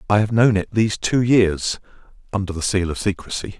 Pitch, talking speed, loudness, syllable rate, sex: 105 Hz, 200 wpm, -20 LUFS, 5.6 syllables/s, male